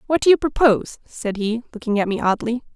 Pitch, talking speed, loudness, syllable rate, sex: 235 Hz, 220 wpm, -20 LUFS, 6.0 syllables/s, female